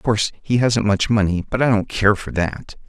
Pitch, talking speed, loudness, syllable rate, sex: 105 Hz, 250 wpm, -19 LUFS, 5.2 syllables/s, male